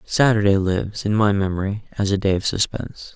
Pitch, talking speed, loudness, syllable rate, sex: 100 Hz, 190 wpm, -20 LUFS, 5.7 syllables/s, male